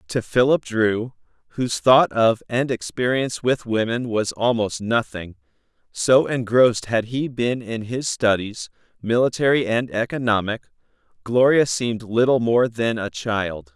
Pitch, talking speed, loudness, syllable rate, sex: 120 Hz, 135 wpm, -20 LUFS, 4.4 syllables/s, male